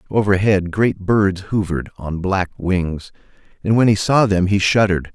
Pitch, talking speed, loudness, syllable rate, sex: 95 Hz, 165 wpm, -17 LUFS, 4.6 syllables/s, male